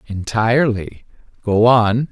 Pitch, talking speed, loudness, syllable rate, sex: 110 Hz, 85 wpm, -16 LUFS, 3.7 syllables/s, male